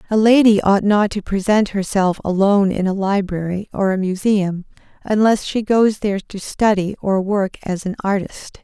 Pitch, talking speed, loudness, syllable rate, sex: 200 Hz, 175 wpm, -17 LUFS, 4.8 syllables/s, female